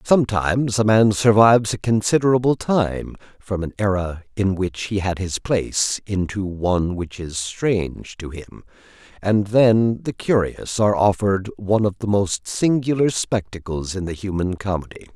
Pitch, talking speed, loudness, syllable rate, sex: 100 Hz, 155 wpm, -20 LUFS, 4.7 syllables/s, male